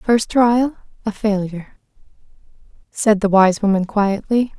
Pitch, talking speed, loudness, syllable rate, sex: 210 Hz, 120 wpm, -17 LUFS, 4.2 syllables/s, female